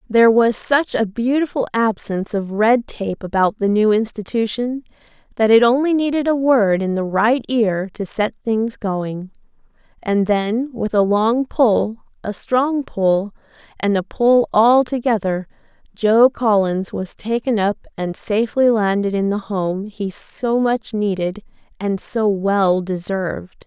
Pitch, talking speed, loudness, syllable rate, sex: 220 Hz, 150 wpm, -18 LUFS, 4.0 syllables/s, female